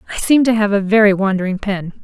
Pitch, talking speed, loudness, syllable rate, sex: 205 Hz, 235 wpm, -15 LUFS, 6.2 syllables/s, female